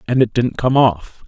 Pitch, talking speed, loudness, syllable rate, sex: 120 Hz, 235 wpm, -16 LUFS, 4.6 syllables/s, male